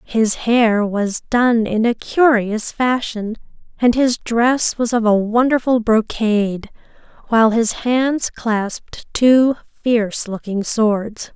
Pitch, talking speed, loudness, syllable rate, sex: 230 Hz, 125 wpm, -17 LUFS, 3.4 syllables/s, female